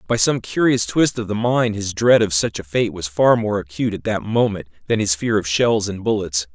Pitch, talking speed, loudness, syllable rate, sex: 105 Hz, 250 wpm, -19 LUFS, 5.2 syllables/s, male